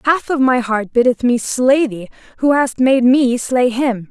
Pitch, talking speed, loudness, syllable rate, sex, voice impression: 250 Hz, 205 wpm, -15 LUFS, 4.1 syllables/s, female, feminine, adult-like, relaxed, slightly weak, soft, raspy, intellectual, calm, friendly, reassuring, elegant, kind, modest